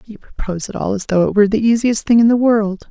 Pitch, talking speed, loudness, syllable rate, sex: 215 Hz, 290 wpm, -15 LUFS, 6.5 syllables/s, female